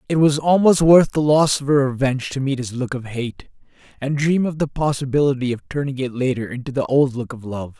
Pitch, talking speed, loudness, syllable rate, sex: 135 Hz, 230 wpm, -19 LUFS, 5.6 syllables/s, male